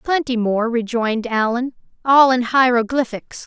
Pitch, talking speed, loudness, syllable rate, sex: 240 Hz, 120 wpm, -17 LUFS, 4.6 syllables/s, female